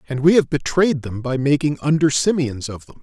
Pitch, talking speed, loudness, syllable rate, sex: 145 Hz, 220 wpm, -18 LUFS, 5.4 syllables/s, male